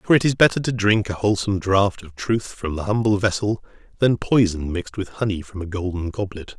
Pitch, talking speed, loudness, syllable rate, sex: 100 Hz, 220 wpm, -21 LUFS, 5.7 syllables/s, male